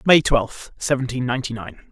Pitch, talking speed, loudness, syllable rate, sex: 125 Hz, 155 wpm, -21 LUFS, 1.7 syllables/s, male